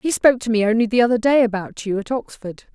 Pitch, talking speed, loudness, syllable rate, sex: 225 Hz, 260 wpm, -18 LUFS, 6.4 syllables/s, female